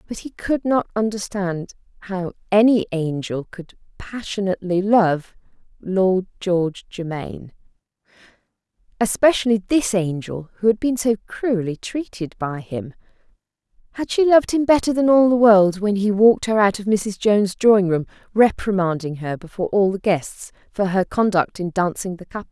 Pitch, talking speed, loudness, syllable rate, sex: 200 Hz, 150 wpm, -19 LUFS, 5.0 syllables/s, female